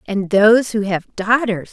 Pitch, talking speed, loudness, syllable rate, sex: 210 Hz, 175 wpm, -16 LUFS, 4.5 syllables/s, female